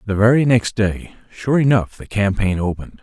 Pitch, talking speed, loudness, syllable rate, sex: 105 Hz, 180 wpm, -17 LUFS, 5.2 syllables/s, male